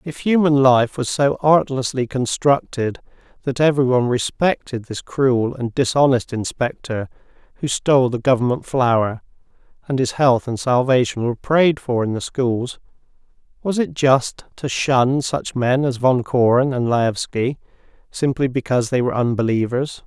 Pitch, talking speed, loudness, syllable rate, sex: 130 Hz, 145 wpm, -19 LUFS, 4.6 syllables/s, male